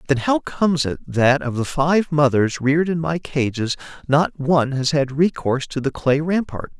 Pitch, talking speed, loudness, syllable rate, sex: 145 Hz, 195 wpm, -20 LUFS, 4.8 syllables/s, male